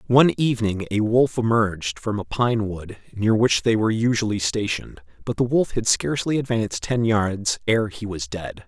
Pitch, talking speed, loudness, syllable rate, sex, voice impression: 110 Hz, 185 wpm, -22 LUFS, 5.1 syllables/s, male, masculine, very adult-like, slightly thick, cool, slightly sincere, slightly wild